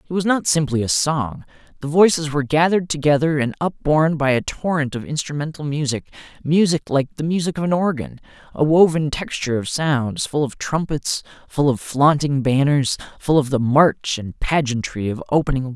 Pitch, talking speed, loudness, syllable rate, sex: 145 Hz, 180 wpm, -19 LUFS, 5.3 syllables/s, male